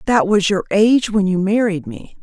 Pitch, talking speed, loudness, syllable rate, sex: 200 Hz, 215 wpm, -16 LUFS, 5.1 syllables/s, female